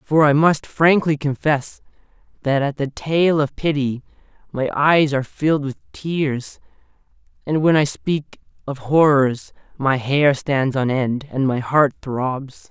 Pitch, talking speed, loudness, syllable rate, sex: 140 Hz, 150 wpm, -19 LUFS, 3.8 syllables/s, male